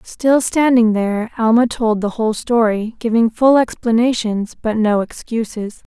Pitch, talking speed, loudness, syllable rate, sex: 225 Hz, 140 wpm, -16 LUFS, 4.5 syllables/s, female